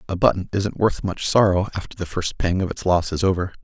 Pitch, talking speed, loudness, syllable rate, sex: 95 Hz, 245 wpm, -21 LUFS, 5.7 syllables/s, male